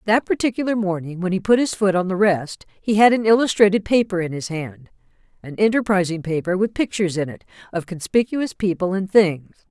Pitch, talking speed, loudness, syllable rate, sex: 195 Hz, 185 wpm, -20 LUFS, 5.6 syllables/s, female